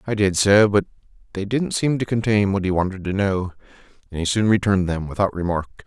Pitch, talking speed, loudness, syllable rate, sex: 100 Hz, 215 wpm, -20 LUFS, 5.7 syllables/s, male